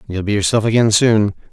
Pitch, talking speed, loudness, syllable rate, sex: 105 Hz, 195 wpm, -15 LUFS, 5.8 syllables/s, male